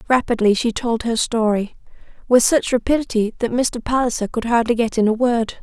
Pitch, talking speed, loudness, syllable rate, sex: 235 Hz, 170 wpm, -18 LUFS, 5.3 syllables/s, female